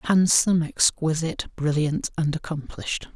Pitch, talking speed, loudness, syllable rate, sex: 155 Hz, 95 wpm, -23 LUFS, 4.9 syllables/s, male